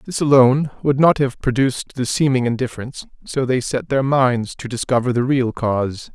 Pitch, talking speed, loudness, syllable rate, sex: 130 Hz, 185 wpm, -18 LUFS, 5.5 syllables/s, male